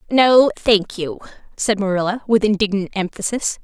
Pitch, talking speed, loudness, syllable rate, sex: 215 Hz, 130 wpm, -18 LUFS, 4.8 syllables/s, female